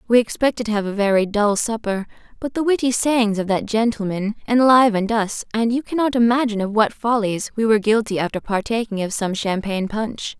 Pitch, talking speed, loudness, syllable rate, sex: 220 Hz, 190 wpm, -20 LUFS, 5.7 syllables/s, female